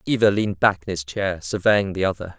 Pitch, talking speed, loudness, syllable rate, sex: 95 Hz, 225 wpm, -21 LUFS, 5.9 syllables/s, male